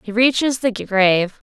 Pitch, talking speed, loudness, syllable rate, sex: 220 Hz, 160 wpm, -17 LUFS, 4.6 syllables/s, female